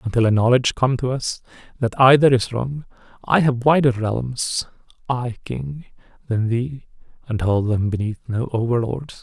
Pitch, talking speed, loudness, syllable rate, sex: 120 Hz, 155 wpm, -20 LUFS, 4.6 syllables/s, male